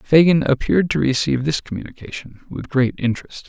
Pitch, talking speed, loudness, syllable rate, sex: 135 Hz, 155 wpm, -19 LUFS, 6.0 syllables/s, male